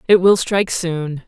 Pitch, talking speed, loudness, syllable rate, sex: 175 Hz, 190 wpm, -17 LUFS, 4.5 syllables/s, female